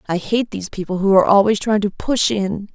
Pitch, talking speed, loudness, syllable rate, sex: 200 Hz, 240 wpm, -17 LUFS, 5.9 syllables/s, female